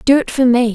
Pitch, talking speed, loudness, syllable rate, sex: 250 Hz, 325 wpm, -14 LUFS, 6.2 syllables/s, female